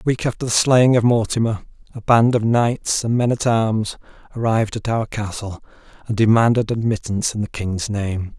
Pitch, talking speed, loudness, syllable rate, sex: 110 Hz, 185 wpm, -19 LUFS, 5.1 syllables/s, male